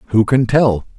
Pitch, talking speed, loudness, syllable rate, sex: 120 Hz, 185 wpm, -14 LUFS, 3.5 syllables/s, male